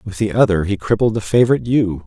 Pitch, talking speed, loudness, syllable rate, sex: 100 Hz, 230 wpm, -16 LUFS, 6.6 syllables/s, male